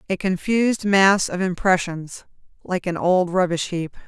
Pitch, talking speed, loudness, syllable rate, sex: 185 Hz, 145 wpm, -20 LUFS, 4.4 syllables/s, female